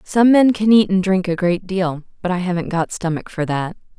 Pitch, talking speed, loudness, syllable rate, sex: 185 Hz, 240 wpm, -18 LUFS, 5.1 syllables/s, female